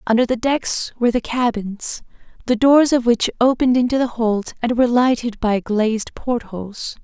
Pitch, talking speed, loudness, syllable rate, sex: 235 Hz, 170 wpm, -18 LUFS, 5.0 syllables/s, female